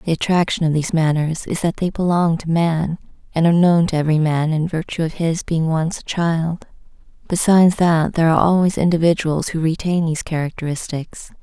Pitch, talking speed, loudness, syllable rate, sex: 165 Hz, 185 wpm, -18 LUFS, 5.7 syllables/s, female